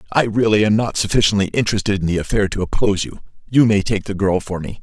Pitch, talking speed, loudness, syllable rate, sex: 100 Hz, 235 wpm, -18 LUFS, 6.8 syllables/s, male